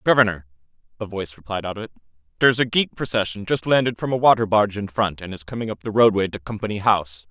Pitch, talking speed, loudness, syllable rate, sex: 105 Hz, 230 wpm, -21 LUFS, 7.0 syllables/s, male